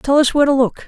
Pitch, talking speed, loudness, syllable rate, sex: 270 Hz, 345 wpm, -15 LUFS, 8.5 syllables/s, female